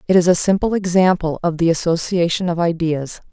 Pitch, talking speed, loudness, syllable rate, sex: 175 Hz, 180 wpm, -17 LUFS, 5.6 syllables/s, female